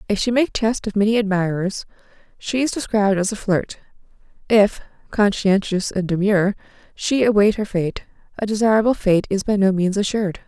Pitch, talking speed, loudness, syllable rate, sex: 205 Hz, 165 wpm, -19 LUFS, 5.5 syllables/s, female